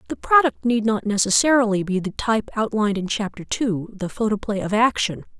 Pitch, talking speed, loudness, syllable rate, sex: 215 Hz, 180 wpm, -21 LUFS, 5.6 syllables/s, female